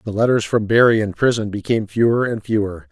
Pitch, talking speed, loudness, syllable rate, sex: 110 Hz, 205 wpm, -18 LUFS, 6.1 syllables/s, male